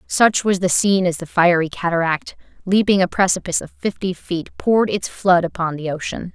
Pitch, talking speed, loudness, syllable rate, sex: 180 Hz, 190 wpm, -18 LUFS, 5.4 syllables/s, female